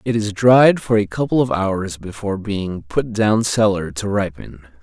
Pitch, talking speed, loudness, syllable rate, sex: 105 Hz, 185 wpm, -18 LUFS, 4.4 syllables/s, male